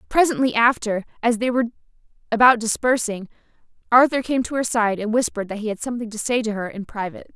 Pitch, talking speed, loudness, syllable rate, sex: 230 Hz, 195 wpm, -21 LUFS, 6.7 syllables/s, female